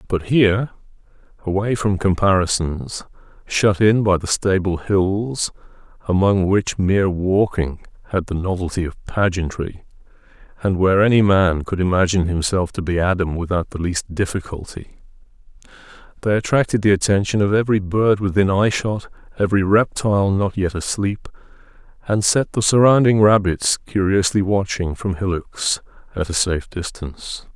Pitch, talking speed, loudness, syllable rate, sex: 95 Hz, 135 wpm, -19 LUFS, 5.0 syllables/s, male